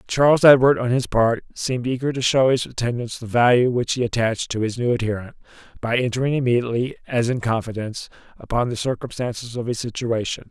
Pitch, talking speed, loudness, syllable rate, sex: 120 Hz, 185 wpm, -21 LUFS, 6.2 syllables/s, male